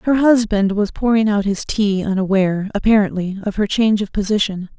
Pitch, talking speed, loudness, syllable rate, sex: 205 Hz, 175 wpm, -17 LUFS, 5.6 syllables/s, female